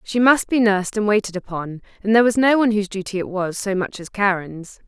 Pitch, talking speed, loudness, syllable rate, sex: 205 Hz, 245 wpm, -19 LUFS, 6.2 syllables/s, female